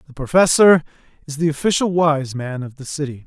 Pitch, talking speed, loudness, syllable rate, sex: 150 Hz, 185 wpm, -18 LUFS, 5.6 syllables/s, male